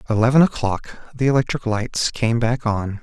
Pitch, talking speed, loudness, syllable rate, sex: 115 Hz, 180 wpm, -20 LUFS, 4.9 syllables/s, male